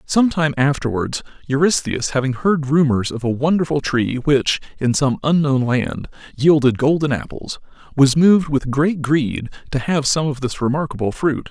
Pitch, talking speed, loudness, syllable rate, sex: 140 Hz, 155 wpm, -18 LUFS, 4.9 syllables/s, male